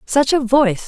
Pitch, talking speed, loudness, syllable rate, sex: 255 Hz, 205 wpm, -15 LUFS, 5.3 syllables/s, female